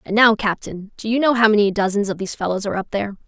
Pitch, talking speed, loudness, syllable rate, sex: 210 Hz, 275 wpm, -19 LUFS, 7.2 syllables/s, female